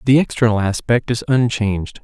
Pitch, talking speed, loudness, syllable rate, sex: 115 Hz, 145 wpm, -17 LUFS, 5.4 syllables/s, male